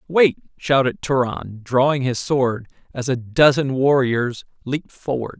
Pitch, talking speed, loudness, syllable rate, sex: 130 Hz, 135 wpm, -19 LUFS, 4.1 syllables/s, male